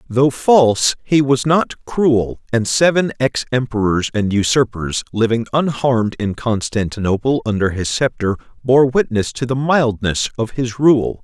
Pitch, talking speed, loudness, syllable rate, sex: 120 Hz, 145 wpm, -17 LUFS, 4.4 syllables/s, male